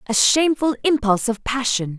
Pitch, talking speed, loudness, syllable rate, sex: 245 Hz, 150 wpm, -19 LUFS, 5.7 syllables/s, female